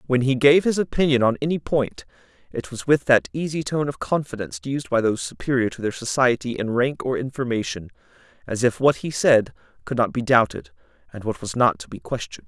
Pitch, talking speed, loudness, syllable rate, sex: 125 Hz, 200 wpm, -22 LUFS, 5.7 syllables/s, male